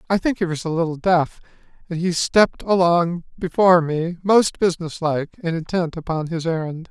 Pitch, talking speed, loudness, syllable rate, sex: 170 Hz, 175 wpm, -20 LUFS, 5.4 syllables/s, male